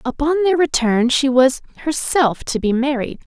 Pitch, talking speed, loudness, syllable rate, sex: 270 Hz, 160 wpm, -17 LUFS, 4.6 syllables/s, female